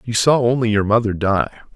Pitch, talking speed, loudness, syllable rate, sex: 110 Hz, 205 wpm, -17 LUFS, 5.6 syllables/s, male